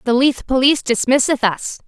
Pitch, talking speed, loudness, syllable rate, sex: 255 Hz, 160 wpm, -16 LUFS, 5.3 syllables/s, female